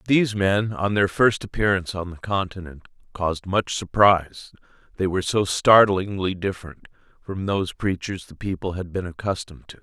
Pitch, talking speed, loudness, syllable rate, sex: 95 Hz, 160 wpm, -22 LUFS, 5.4 syllables/s, male